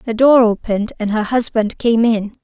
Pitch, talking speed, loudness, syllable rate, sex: 225 Hz, 195 wpm, -15 LUFS, 5.1 syllables/s, female